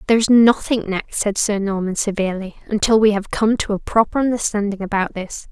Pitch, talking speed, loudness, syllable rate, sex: 210 Hz, 195 wpm, -18 LUFS, 5.8 syllables/s, female